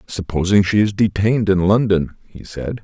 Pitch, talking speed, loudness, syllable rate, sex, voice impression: 100 Hz, 170 wpm, -17 LUFS, 5.0 syllables/s, male, masculine, middle-aged, thick, tensed, hard, muffled, slightly raspy, cool, mature, wild, slightly kind, modest